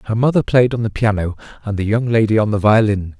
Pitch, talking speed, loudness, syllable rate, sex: 110 Hz, 245 wpm, -16 LUFS, 6.3 syllables/s, male